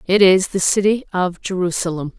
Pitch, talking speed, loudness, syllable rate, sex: 185 Hz, 165 wpm, -17 LUFS, 5.2 syllables/s, female